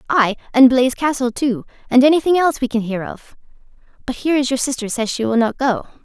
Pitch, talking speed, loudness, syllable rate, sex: 255 Hz, 220 wpm, -17 LUFS, 6.4 syllables/s, female